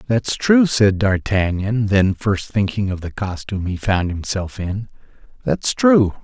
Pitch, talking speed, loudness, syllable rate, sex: 105 Hz, 155 wpm, -19 LUFS, 4.0 syllables/s, male